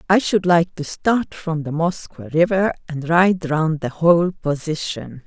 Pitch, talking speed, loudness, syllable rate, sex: 165 Hz, 170 wpm, -19 LUFS, 4.1 syllables/s, female